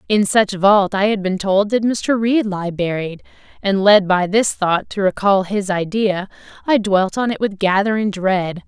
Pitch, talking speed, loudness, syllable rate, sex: 200 Hz, 195 wpm, -17 LUFS, 4.3 syllables/s, female